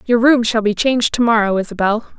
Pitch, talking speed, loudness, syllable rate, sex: 225 Hz, 220 wpm, -15 LUFS, 5.9 syllables/s, female